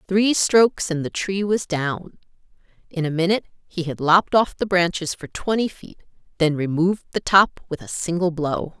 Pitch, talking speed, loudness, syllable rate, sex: 175 Hz, 185 wpm, -21 LUFS, 5.0 syllables/s, female